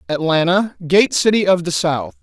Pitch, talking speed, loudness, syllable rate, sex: 180 Hz, 160 wpm, -16 LUFS, 4.7 syllables/s, male